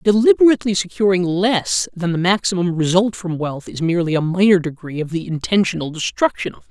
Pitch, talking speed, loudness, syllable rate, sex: 180 Hz, 180 wpm, -18 LUFS, 5.9 syllables/s, male